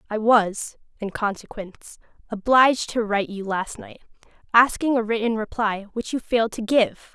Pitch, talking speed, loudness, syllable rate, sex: 220 Hz, 160 wpm, -22 LUFS, 4.9 syllables/s, female